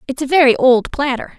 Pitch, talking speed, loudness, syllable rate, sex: 270 Hz, 215 wpm, -14 LUFS, 5.7 syllables/s, female